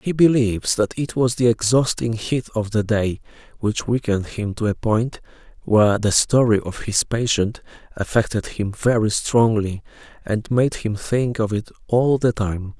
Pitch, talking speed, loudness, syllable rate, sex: 115 Hz, 170 wpm, -20 LUFS, 4.5 syllables/s, male